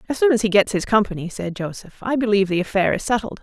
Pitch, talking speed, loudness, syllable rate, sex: 205 Hz, 265 wpm, -20 LUFS, 6.9 syllables/s, female